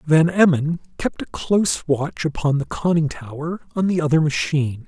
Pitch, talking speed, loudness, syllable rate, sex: 150 Hz, 170 wpm, -20 LUFS, 4.9 syllables/s, male